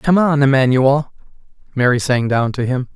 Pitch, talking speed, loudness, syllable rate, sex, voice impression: 135 Hz, 160 wpm, -15 LUFS, 4.8 syllables/s, male, very masculine, adult-like, middle-aged, thick, tensed, powerful, slightly bright, slightly soft, clear, fluent, cool, intellectual, very refreshing, very sincere, calm, friendly, reassuring, unique, elegant, slightly wild, sweet, slightly lively, kind, slightly modest, slightly light